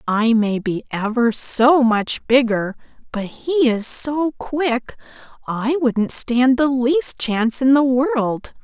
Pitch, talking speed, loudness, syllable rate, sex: 250 Hz, 145 wpm, -18 LUFS, 3.2 syllables/s, female